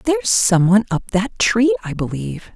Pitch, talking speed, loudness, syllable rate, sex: 185 Hz, 165 wpm, -17 LUFS, 5.3 syllables/s, female